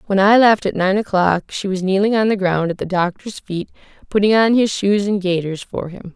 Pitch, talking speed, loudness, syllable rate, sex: 195 Hz, 235 wpm, -17 LUFS, 5.2 syllables/s, female